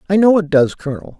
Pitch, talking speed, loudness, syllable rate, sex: 170 Hz, 250 wpm, -14 LUFS, 7.1 syllables/s, male